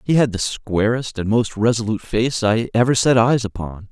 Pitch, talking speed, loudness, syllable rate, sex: 115 Hz, 200 wpm, -18 LUFS, 5.1 syllables/s, male